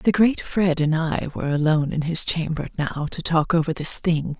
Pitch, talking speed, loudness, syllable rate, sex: 160 Hz, 220 wpm, -21 LUFS, 5.1 syllables/s, female